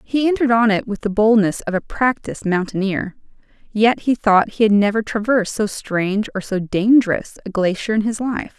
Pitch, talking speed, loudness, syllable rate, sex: 215 Hz, 195 wpm, -18 LUFS, 5.4 syllables/s, female